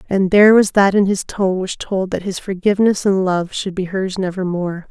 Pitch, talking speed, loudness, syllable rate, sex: 190 Hz, 220 wpm, -17 LUFS, 5.3 syllables/s, female